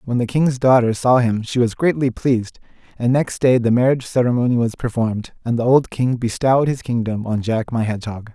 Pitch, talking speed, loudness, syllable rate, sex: 120 Hz, 210 wpm, -18 LUFS, 5.7 syllables/s, male